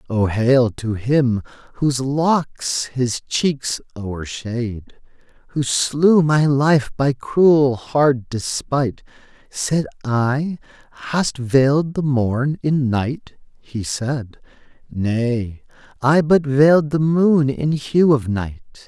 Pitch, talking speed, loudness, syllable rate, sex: 135 Hz, 120 wpm, -19 LUFS, 2.9 syllables/s, male